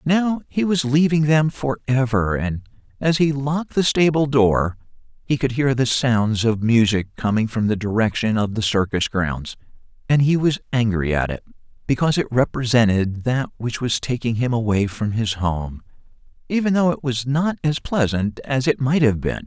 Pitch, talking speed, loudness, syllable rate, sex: 125 Hz, 180 wpm, -20 LUFS, 4.7 syllables/s, male